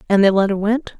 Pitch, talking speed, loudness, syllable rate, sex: 205 Hz, 240 wpm, -17 LUFS, 6.2 syllables/s, female